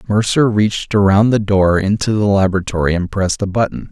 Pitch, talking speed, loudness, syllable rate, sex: 100 Hz, 185 wpm, -15 LUFS, 5.9 syllables/s, male